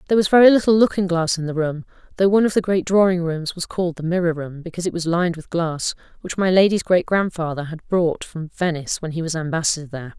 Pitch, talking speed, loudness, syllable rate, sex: 175 Hz, 240 wpm, -20 LUFS, 6.6 syllables/s, female